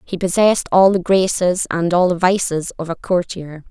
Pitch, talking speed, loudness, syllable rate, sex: 180 Hz, 195 wpm, -16 LUFS, 4.9 syllables/s, female